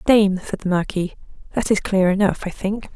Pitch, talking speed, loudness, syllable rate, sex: 195 Hz, 205 wpm, -21 LUFS, 5.7 syllables/s, female